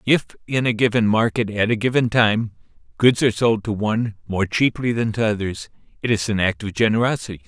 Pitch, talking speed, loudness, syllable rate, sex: 110 Hz, 200 wpm, -20 LUFS, 5.8 syllables/s, male